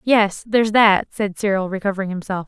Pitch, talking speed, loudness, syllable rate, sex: 200 Hz, 170 wpm, -19 LUFS, 5.5 syllables/s, female